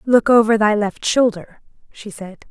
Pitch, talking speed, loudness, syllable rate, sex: 215 Hz, 170 wpm, -16 LUFS, 4.6 syllables/s, female